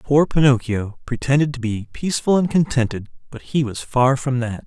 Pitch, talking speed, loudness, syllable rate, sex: 130 Hz, 180 wpm, -20 LUFS, 5.2 syllables/s, male